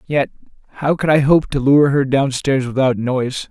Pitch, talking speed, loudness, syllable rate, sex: 135 Hz, 205 wpm, -16 LUFS, 4.9 syllables/s, male